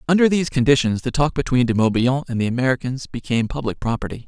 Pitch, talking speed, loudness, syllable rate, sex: 130 Hz, 195 wpm, -20 LUFS, 7.2 syllables/s, male